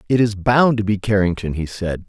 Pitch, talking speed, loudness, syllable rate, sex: 105 Hz, 230 wpm, -18 LUFS, 5.3 syllables/s, male